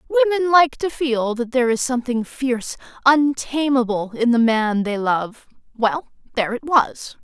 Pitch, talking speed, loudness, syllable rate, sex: 250 Hz, 160 wpm, -19 LUFS, 5.0 syllables/s, female